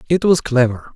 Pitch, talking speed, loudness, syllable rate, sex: 145 Hz, 190 wpm, -16 LUFS, 5.9 syllables/s, male